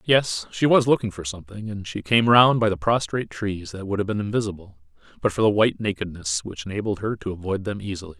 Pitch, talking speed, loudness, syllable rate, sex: 100 Hz, 225 wpm, -23 LUFS, 6.2 syllables/s, male